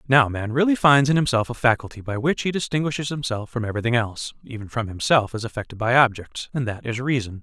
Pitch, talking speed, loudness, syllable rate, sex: 125 Hz, 220 wpm, -22 LUFS, 6.3 syllables/s, male